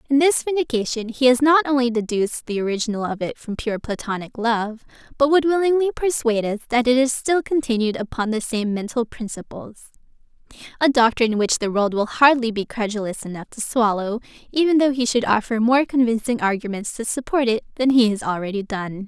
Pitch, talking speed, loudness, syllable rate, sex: 235 Hz, 185 wpm, -20 LUFS, 5.7 syllables/s, female